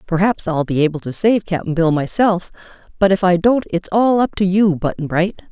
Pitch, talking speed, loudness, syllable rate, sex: 185 Hz, 220 wpm, -17 LUFS, 5.0 syllables/s, female